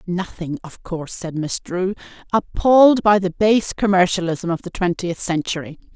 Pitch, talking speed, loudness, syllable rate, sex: 185 Hz, 150 wpm, -19 LUFS, 4.8 syllables/s, female